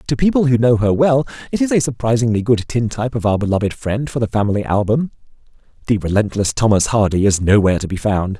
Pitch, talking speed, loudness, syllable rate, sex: 115 Hz, 205 wpm, -17 LUFS, 6.4 syllables/s, male